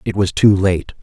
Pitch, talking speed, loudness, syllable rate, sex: 95 Hz, 235 wpm, -15 LUFS, 4.8 syllables/s, male